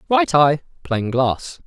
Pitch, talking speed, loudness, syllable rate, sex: 150 Hz, 145 wpm, -19 LUFS, 3.3 syllables/s, male